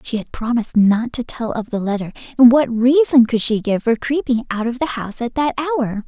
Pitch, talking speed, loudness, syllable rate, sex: 240 Hz, 235 wpm, -17 LUFS, 5.5 syllables/s, female